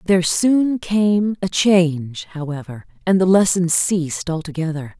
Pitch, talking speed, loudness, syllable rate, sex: 175 Hz, 130 wpm, -18 LUFS, 4.4 syllables/s, female